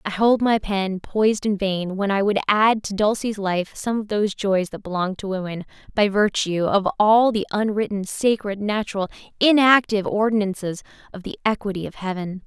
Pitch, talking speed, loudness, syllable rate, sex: 205 Hz, 180 wpm, -21 LUFS, 5.1 syllables/s, female